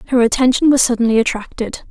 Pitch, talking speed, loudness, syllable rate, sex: 240 Hz, 155 wpm, -15 LUFS, 6.0 syllables/s, female